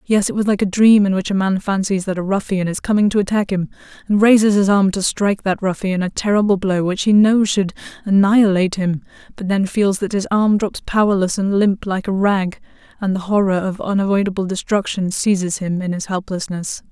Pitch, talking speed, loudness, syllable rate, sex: 195 Hz, 215 wpm, -17 LUFS, 5.6 syllables/s, female